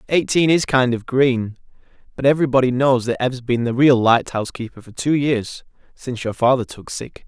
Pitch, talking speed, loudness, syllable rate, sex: 125 Hz, 190 wpm, -18 LUFS, 5.3 syllables/s, male